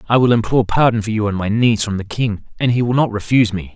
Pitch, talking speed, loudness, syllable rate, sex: 110 Hz, 290 wpm, -17 LUFS, 6.7 syllables/s, male